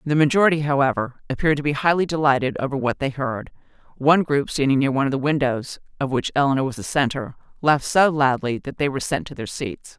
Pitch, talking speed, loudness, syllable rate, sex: 140 Hz, 215 wpm, -21 LUFS, 6.4 syllables/s, female